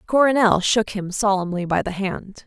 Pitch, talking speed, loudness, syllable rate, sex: 205 Hz, 170 wpm, -20 LUFS, 4.7 syllables/s, female